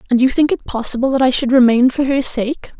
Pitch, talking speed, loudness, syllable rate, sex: 255 Hz, 255 wpm, -15 LUFS, 5.9 syllables/s, female